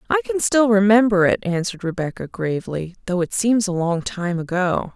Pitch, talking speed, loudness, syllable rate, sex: 195 Hz, 180 wpm, -20 LUFS, 5.2 syllables/s, female